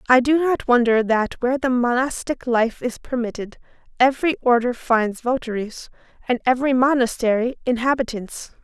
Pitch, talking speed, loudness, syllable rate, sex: 245 Hz, 130 wpm, -20 LUFS, 5.1 syllables/s, female